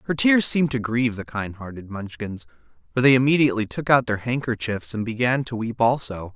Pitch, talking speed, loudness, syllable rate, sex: 115 Hz, 200 wpm, -22 LUFS, 5.8 syllables/s, male